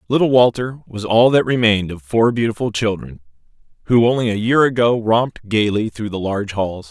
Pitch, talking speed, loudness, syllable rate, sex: 110 Hz, 185 wpm, -17 LUFS, 5.5 syllables/s, male